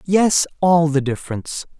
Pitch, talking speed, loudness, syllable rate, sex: 160 Hz, 135 wpm, -18 LUFS, 4.8 syllables/s, male